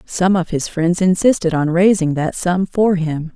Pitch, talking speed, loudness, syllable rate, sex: 175 Hz, 195 wpm, -16 LUFS, 4.3 syllables/s, female